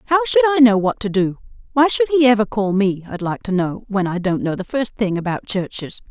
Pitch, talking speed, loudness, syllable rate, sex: 220 Hz, 255 wpm, -18 LUFS, 5.6 syllables/s, female